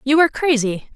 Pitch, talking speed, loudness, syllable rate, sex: 270 Hz, 190 wpm, -17 LUFS, 6.1 syllables/s, female